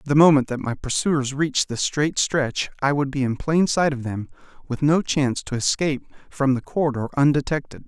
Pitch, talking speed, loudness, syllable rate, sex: 140 Hz, 200 wpm, -22 LUFS, 5.4 syllables/s, male